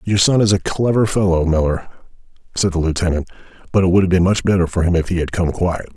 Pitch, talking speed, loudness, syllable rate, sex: 90 Hz, 240 wpm, -17 LUFS, 6.4 syllables/s, male